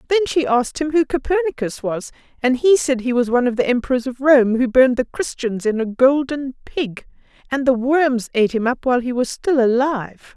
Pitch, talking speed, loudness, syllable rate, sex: 260 Hz, 215 wpm, -18 LUFS, 5.5 syllables/s, female